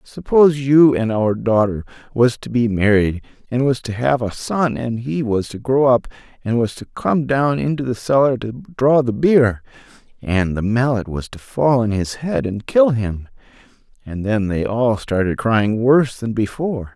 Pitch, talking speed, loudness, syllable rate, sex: 120 Hz, 190 wpm, -18 LUFS, 4.4 syllables/s, male